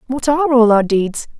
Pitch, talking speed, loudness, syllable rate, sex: 245 Hz, 215 wpm, -14 LUFS, 5.3 syllables/s, female